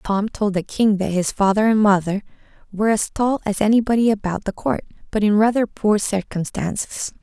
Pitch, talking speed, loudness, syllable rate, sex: 205 Hz, 185 wpm, -20 LUFS, 5.3 syllables/s, female